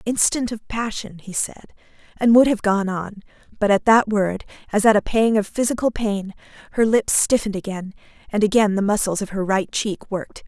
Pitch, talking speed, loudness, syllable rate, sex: 210 Hz, 195 wpm, -20 LUFS, 5.3 syllables/s, female